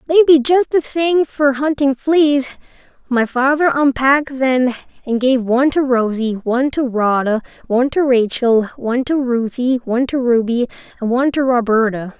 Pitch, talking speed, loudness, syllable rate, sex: 260 Hz, 160 wpm, -16 LUFS, 4.9 syllables/s, female